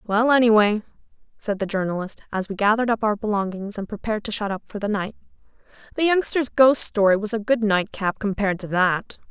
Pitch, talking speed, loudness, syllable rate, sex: 210 Hz, 200 wpm, -21 LUFS, 5.9 syllables/s, female